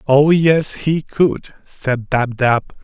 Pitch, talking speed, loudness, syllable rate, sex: 140 Hz, 150 wpm, -16 LUFS, 2.9 syllables/s, male